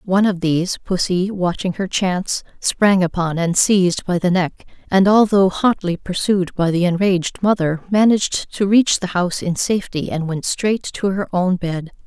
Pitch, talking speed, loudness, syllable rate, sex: 185 Hz, 180 wpm, -18 LUFS, 4.8 syllables/s, female